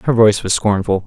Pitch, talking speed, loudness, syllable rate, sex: 105 Hz, 225 wpm, -15 LUFS, 5.8 syllables/s, male